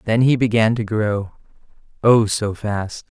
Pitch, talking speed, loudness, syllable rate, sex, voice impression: 110 Hz, 150 wpm, -18 LUFS, 3.8 syllables/s, male, masculine, adult-like, slightly weak, slightly bright, clear, fluent, calm, friendly, reassuring, lively, kind, slightly modest, light